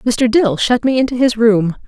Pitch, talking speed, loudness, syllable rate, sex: 235 Hz, 225 wpm, -14 LUFS, 4.6 syllables/s, female